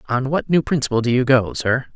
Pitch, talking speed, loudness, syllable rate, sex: 125 Hz, 245 wpm, -19 LUFS, 5.8 syllables/s, male